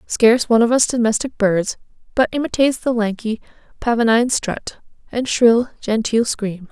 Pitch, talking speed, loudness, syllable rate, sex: 230 Hz, 145 wpm, -18 LUFS, 5.2 syllables/s, female